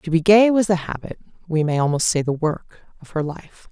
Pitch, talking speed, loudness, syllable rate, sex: 170 Hz, 210 wpm, -19 LUFS, 5.8 syllables/s, female